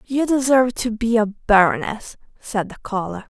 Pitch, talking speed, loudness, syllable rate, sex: 225 Hz, 160 wpm, -19 LUFS, 4.8 syllables/s, female